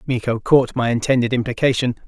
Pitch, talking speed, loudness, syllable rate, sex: 120 Hz, 145 wpm, -18 LUFS, 6.0 syllables/s, male